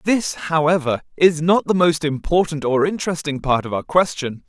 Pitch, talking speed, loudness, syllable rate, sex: 160 Hz, 175 wpm, -19 LUFS, 5.0 syllables/s, male